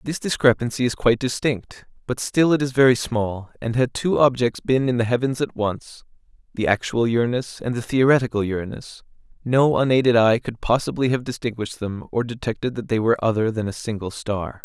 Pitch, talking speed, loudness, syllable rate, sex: 120 Hz, 190 wpm, -21 LUFS, 5.6 syllables/s, male